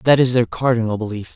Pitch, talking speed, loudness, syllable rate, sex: 120 Hz, 220 wpm, -18 LUFS, 6.1 syllables/s, male